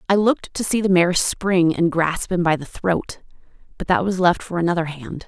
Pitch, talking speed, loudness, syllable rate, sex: 175 Hz, 230 wpm, -20 LUFS, 5.1 syllables/s, female